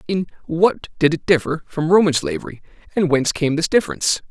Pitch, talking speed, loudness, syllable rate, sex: 165 Hz, 180 wpm, -19 LUFS, 6.1 syllables/s, male